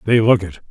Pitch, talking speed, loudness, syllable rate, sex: 105 Hz, 255 wpm, -16 LUFS, 5.9 syllables/s, male